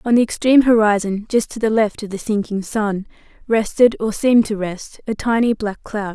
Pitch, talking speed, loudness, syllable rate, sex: 215 Hz, 205 wpm, -18 LUFS, 5.2 syllables/s, female